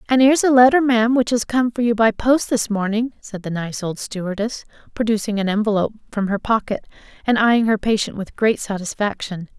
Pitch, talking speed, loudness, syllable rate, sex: 220 Hz, 200 wpm, -19 LUFS, 5.9 syllables/s, female